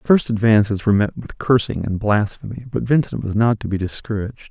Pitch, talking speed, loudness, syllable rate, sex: 110 Hz, 215 wpm, -19 LUFS, 6.1 syllables/s, male